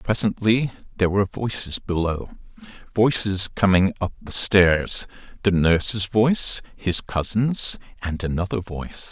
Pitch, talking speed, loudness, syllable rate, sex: 100 Hz, 110 wpm, -22 LUFS, 4.4 syllables/s, male